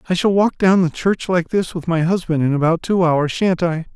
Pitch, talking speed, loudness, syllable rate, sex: 175 Hz, 260 wpm, -17 LUFS, 5.1 syllables/s, male